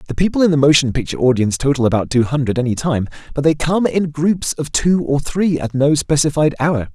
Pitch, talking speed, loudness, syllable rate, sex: 145 Hz, 225 wpm, -16 LUFS, 5.9 syllables/s, male